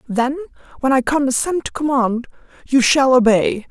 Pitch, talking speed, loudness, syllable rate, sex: 265 Hz, 145 wpm, -17 LUFS, 4.9 syllables/s, female